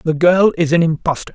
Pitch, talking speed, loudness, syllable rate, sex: 165 Hz, 220 wpm, -15 LUFS, 5.5 syllables/s, male